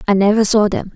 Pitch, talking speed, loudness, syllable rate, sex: 205 Hz, 250 wpm, -14 LUFS, 6.3 syllables/s, female